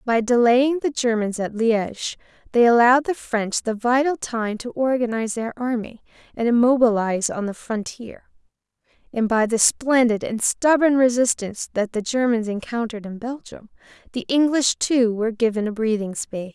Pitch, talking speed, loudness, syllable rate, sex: 235 Hz, 155 wpm, -21 LUFS, 5.0 syllables/s, female